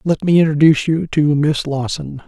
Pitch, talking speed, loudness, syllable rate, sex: 150 Hz, 185 wpm, -15 LUFS, 5.1 syllables/s, male